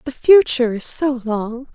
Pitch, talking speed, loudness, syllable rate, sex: 255 Hz, 170 wpm, -16 LUFS, 4.5 syllables/s, female